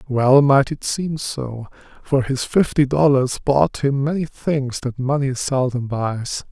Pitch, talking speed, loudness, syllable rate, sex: 135 Hz, 155 wpm, -19 LUFS, 3.7 syllables/s, male